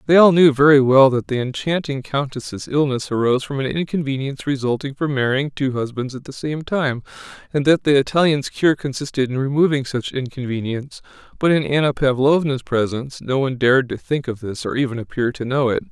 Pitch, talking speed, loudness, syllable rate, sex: 135 Hz, 190 wpm, -19 LUFS, 5.8 syllables/s, male